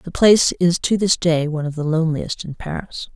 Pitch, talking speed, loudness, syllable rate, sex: 165 Hz, 230 wpm, -18 LUFS, 5.6 syllables/s, female